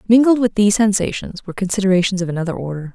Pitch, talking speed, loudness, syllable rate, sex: 200 Hz, 185 wpm, -17 LUFS, 7.5 syllables/s, female